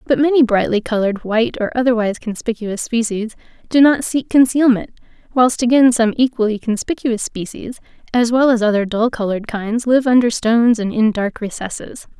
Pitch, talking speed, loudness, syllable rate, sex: 230 Hz, 160 wpm, -16 LUFS, 5.5 syllables/s, female